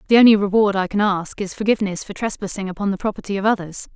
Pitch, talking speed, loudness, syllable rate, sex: 200 Hz, 230 wpm, -19 LUFS, 7.1 syllables/s, female